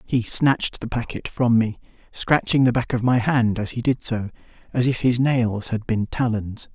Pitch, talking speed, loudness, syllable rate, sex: 120 Hz, 205 wpm, -22 LUFS, 4.6 syllables/s, male